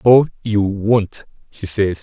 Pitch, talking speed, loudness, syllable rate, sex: 105 Hz, 150 wpm, -17 LUFS, 3.3 syllables/s, male